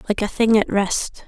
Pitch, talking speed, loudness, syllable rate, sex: 210 Hz, 235 wpm, -19 LUFS, 4.6 syllables/s, female